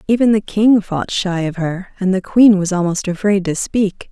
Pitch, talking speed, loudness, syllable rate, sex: 195 Hz, 220 wpm, -16 LUFS, 4.7 syllables/s, female